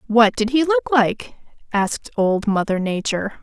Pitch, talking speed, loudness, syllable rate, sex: 225 Hz, 160 wpm, -19 LUFS, 4.7 syllables/s, female